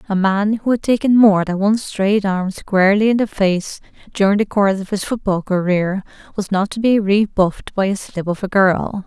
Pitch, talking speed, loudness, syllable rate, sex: 200 Hz, 210 wpm, -17 LUFS, 5.1 syllables/s, female